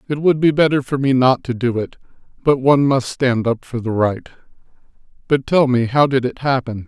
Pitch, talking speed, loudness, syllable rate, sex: 130 Hz, 220 wpm, -17 LUFS, 5.5 syllables/s, male